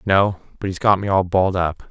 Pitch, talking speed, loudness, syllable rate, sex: 95 Hz, 220 wpm, -19 LUFS, 5.6 syllables/s, male